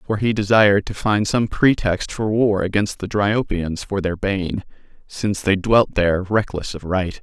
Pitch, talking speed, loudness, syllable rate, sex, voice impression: 100 Hz, 185 wpm, -19 LUFS, 4.6 syllables/s, male, very masculine, slightly old, very thick, slightly relaxed, slightly powerful, slightly bright, soft, muffled, slightly halting, raspy, very cool, intellectual, slightly refreshing, sincere, very calm, very mature, very friendly, very reassuring, unique, elegant, very wild, sweet, slightly lively, kind, slightly modest